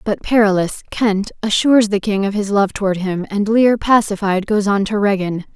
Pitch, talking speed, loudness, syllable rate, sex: 205 Hz, 175 wpm, -16 LUFS, 5.0 syllables/s, female